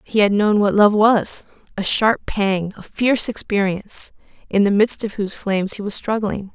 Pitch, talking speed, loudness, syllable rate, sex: 205 Hz, 185 wpm, -18 LUFS, 4.9 syllables/s, female